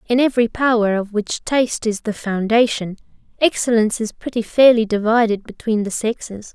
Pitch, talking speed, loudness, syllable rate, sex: 225 Hz, 155 wpm, -18 LUFS, 5.3 syllables/s, female